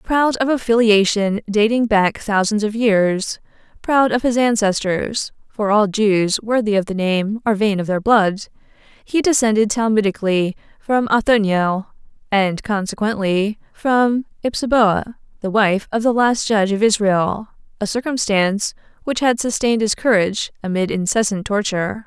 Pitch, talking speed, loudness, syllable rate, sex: 215 Hz, 135 wpm, -18 LUFS, 4.6 syllables/s, female